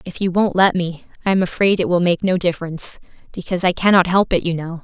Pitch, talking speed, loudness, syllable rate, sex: 180 Hz, 250 wpm, -18 LUFS, 6.4 syllables/s, female